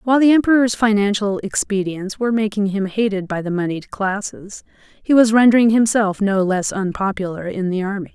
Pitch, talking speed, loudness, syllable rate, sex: 205 Hz, 170 wpm, -18 LUFS, 5.4 syllables/s, female